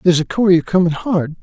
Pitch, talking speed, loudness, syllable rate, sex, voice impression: 175 Hz, 170 wpm, -15 LUFS, 6.3 syllables/s, male, very masculine, very adult-like, cool, slightly intellectual, sincere, calm, slightly wild, slightly sweet